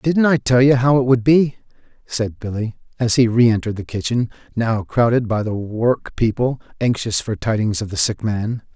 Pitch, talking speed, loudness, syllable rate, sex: 115 Hz, 185 wpm, -18 LUFS, 5.0 syllables/s, male